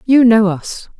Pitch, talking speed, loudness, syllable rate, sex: 225 Hz, 180 wpm, -12 LUFS, 3.7 syllables/s, female